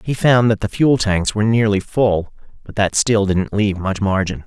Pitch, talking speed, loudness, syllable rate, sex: 105 Hz, 215 wpm, -17 LUFS, 4.9 syllables/s, male